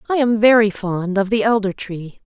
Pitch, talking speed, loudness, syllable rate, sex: 210 Hz, 210 wpm, -17 LUFS, 4.9 syllables/s, female